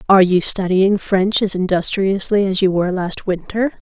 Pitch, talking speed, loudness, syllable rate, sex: 190 Hz, 170 wpm, -17 LUFS, 5.0 syllables/s, female